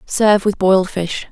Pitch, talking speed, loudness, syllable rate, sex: 195 Hz, 180 wpm, -15 LUFS, 5.1 syllables/s, female